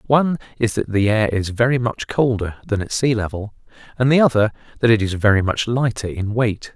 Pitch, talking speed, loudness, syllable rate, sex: 115 Hz, 205 wpm, -19 LUFS, 5.5 syllables/s, male